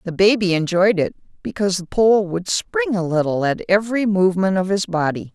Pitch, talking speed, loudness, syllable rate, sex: 185 Hz, 190 wpm, -19 LUFS, 5.4 syllables/s, female